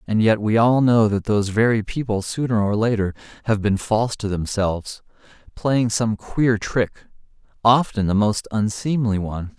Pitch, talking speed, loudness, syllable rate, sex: 110 Hz, 165 wpm, -20 LUFS, 4.8 syllables/s, male